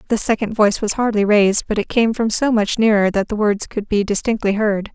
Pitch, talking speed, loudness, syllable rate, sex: 210 Hz, 240 wpm, -17 LUFS, 5.7 syllables/s, female